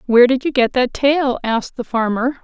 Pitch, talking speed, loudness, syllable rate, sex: 250 Hz, 220 wpm, -17 LUFS, 5.3 syllables/s, female